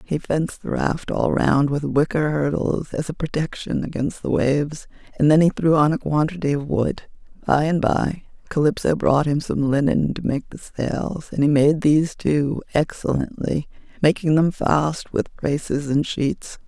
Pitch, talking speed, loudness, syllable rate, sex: 150 Hz, 175 wpm, -21 LUFS, 4.5 syllables/s, female